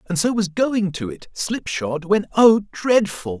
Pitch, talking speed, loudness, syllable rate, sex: 190 Hz, 195 wpm, -20 LUFS, 3.8 syllables/s, male